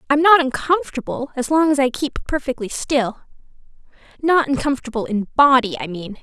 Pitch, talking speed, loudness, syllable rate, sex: 270 Hz, 155 wpm, -19 LUFS, 5.7 syllables/s, female